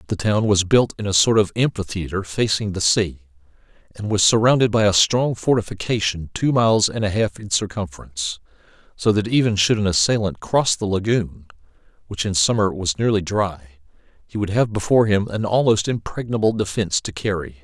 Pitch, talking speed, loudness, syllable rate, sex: 100 Hz, 175 wpm, -20 LUFS, 5.5 syllables/s, male